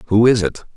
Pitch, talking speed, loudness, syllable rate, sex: 110 Hz, 235 wpm, -16 LUFS, 6.7 syllables/s, male